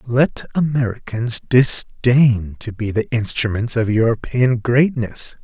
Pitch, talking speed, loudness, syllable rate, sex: 120 Hz, 110 wpm, -18 LUFS, 3.7 syllables/s, male